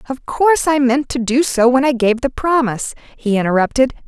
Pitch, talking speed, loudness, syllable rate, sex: 255 Hz, 205 wpm, -16 LUFS, 5.6 syllables/s, female